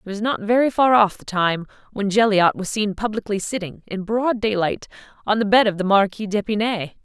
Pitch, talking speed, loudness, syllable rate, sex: 210 Hz, 205 wpm, -20 LUFS, 5.6 syllables/s, female